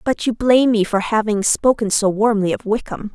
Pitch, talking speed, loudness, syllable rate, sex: 215 Hz, 210 wpm, -17 LUFS, 5.3 syllables/s, female